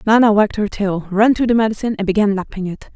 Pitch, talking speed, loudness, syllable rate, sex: 210 Hz, 245 wpm, -16 LUFS, 6.8 syllables/s, female